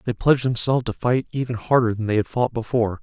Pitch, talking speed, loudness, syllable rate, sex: 120 Hz, 240 wpm, -21 LUFS, 6.7 syllables/s, male